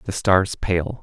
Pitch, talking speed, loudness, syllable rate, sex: 90 Hz, 175 wpm, -20 LUFS, 3.4 syllables/s, male